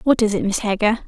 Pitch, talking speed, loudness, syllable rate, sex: 215 Hz, 280 wpm, -19 LUFS, 6.2 syllables/s, female